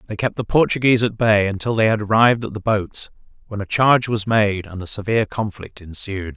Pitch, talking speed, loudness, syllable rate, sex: 105 Hz, 215 wpm, -19 LUFS, 5.8 syllables/s, male